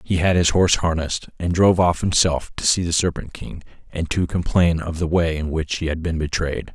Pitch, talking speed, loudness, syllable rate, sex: 85 Hz, 230 wpm, -20 LUFS, 5.4 syllables/s, male